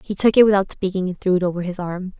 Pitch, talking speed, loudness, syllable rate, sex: 190 Hz, 300 wpm, -19 LUFS, 6.8 syllables/s, female